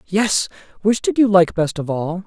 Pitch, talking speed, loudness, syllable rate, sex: 185 Hz, 210 wpm, -18 LUFS, 4.4 syllables/s, male